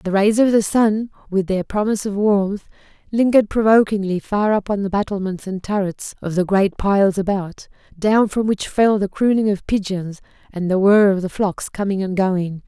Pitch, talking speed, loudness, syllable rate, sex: 200 Hz, 195 wpm, -18 LUFS, 4.9 syllables/s, female